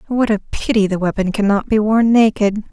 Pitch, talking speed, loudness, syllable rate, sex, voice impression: 210 Hz, 200 wpm, -16 LUFS, 5.4 syllables/s, female, very feminine, very adult-like, slightly middle-aged, thin, slightly relaxed, slightly weak, slightly bright, soft, slightly muffled, very fluent, slightly raspy, cute, very intellectual, very refreshing, very sincere, calm, friendly, reassuring, unique, very elegant, very sweet, slightly lively, very kind, slightly modest, light